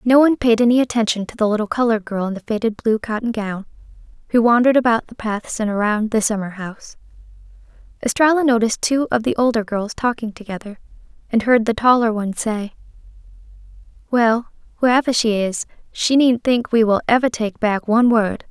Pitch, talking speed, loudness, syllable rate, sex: 225 Hz, 180 wpm, -18 LUFS, 5.9 syllables/s, female